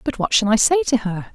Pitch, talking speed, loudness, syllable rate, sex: 240 Hz, 310 wpm, -18 LUFS, 6.2 syllables/s, female